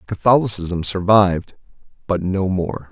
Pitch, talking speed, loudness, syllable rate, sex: 95 Hz, 105 wpm, -18 LUFS, 4.4 syllables/s, male